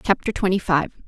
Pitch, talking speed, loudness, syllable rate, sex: 185 Hz, 165 wpm, -21 LUFS, 5.7 syllables/s, female